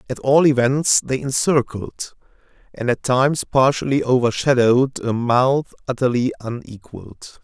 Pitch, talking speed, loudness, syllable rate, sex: 130 Hz, 115 wpm, -18 LUFS, 4.6 syllables/s, male